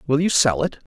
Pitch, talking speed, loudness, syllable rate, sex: 140 Hz, 255 wpm, -19 LUFS, 5.6 syllables/s, male